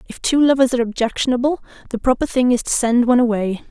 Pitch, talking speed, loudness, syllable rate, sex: 245 Hz, 210 wpm, -17 LUFS, 6.8 syllables/s, female